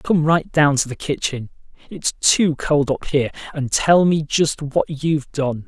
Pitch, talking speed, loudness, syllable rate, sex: 145 Hz, 170 wpm, -19 LUFS, 4.2 syllables/s, male